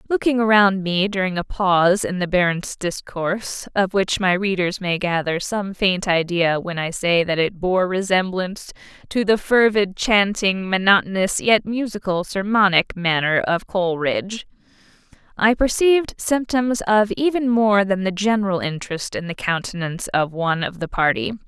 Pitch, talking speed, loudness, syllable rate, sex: 195 Hz, 155 wpm, -19 LUFS, 2.8 syllables/s, female